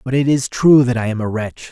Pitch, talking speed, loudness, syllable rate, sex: 125 Hz, 315 wpm, -16 LUFS, 5.6 syllables/s, male